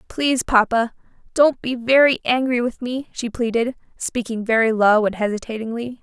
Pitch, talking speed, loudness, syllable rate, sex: 235 Hz, 150 wpm, -20 LUFS, 5.0 syllables/s, female